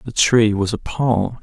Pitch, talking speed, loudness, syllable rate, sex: 110 Hz, 210 wpm, -18 LUFS, 3.7 syllables/s, male